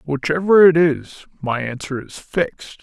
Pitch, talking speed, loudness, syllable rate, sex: 150 Hz, 150 wpm, -18 LUFS, 4.3 syllables/s, male